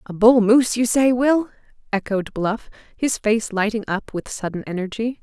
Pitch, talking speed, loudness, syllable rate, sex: 220 Hz, 170 wpm, -20 LUFS, 4.8 syllables/s, female